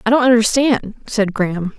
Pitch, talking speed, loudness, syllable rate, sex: 225 Hz, 170 wpm, -16 LUFS, 5.1 syllables/s, female